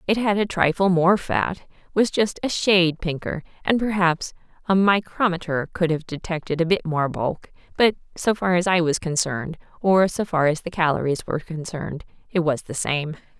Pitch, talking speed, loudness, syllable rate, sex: 175 Hz, 185 wpm, -22 LUFS, 5.1 syllables/s, female